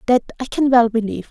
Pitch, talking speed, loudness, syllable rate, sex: 240 Hz, 230 wpm, -17 LUFS, 7.1 syllables/s, female